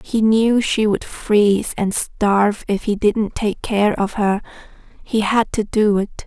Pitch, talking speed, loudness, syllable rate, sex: 210 Hz, 180 wpm, -18 LUFS, 3.8 syllables/s, female